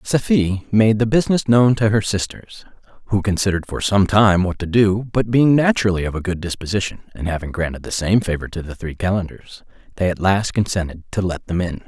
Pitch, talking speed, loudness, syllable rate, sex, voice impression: 100 Hz, 205 wpm, -19 LUFS, 5.7 syllables/s, male, very masculine, very middle-aged, very thick, tensed, powerful, slightly dark, slightly hard, muffled, fluent, slightly raspy, cool, intellectual, slightly refreshing, sincere, calm, mature, very friendly, very reassuring, unique, slightly elegant, wild, sweet, lively, strict, slightly intense, slightly modest